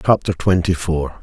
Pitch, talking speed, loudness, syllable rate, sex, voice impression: 85 Hz, 145 wpm, -18 LUFS, 4.8 syllables/s, male, very masculine, very adult-like, slightly old, very thick, slightly tensed, very powerful, slightly bright, slightly hard, muffled, fluent, slightly raspy, very cool, intellectual, slightly sincere, very calm, very mature, very friendly, very reassuring, very unique, slightly elegant, very wild, sweet, slightly lively, kind